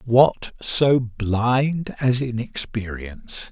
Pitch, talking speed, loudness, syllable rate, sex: 120 Hz, 85 wpm, -21 LUFS, 2.7 syllables/s, male